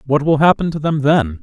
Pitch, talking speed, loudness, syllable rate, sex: 140 Hz, 255 wpm, -15 LUFS, 5.4 syllables/s, male